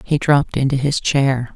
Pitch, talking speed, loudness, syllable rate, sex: 135 Hz, 195 wpm, -17 LUFS, 4.8 syllables/s, female